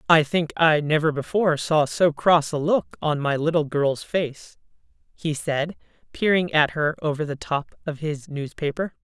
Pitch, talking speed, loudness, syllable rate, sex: 155 Hz, 175 wpm, -23 LUFS, 4.4 syllables/s, female